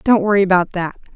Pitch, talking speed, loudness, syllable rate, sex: 190 Hz, 210 wpm, -16 LUFS, 6.5 syllables/s, female